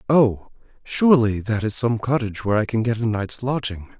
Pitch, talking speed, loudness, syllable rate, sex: 115 Hz, 195 wpm, -21 LUFS, 5.5 syllables/s, male